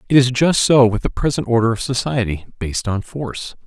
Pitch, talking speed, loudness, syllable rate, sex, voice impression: 120 Hz, 215 wpm, -18 LUFS, 5.9 syllables/s, male, very masculine, adult-like, slightly middle-aged, slightly thick, slightly relaxed, powerful, slightly bright, soft, slightly muffled, fluent, slightly cool, intellectual, slightly refreshing, sincere, calm, slightly mature, friendly, reassuring, slightly unique, slightly elegant, slightly wild, slightly sweet, slightly lively, kind, modest